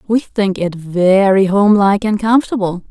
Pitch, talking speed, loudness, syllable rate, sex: 200 Hz, 145 wpm, -13 LUFS, 5.2 syllables/s, female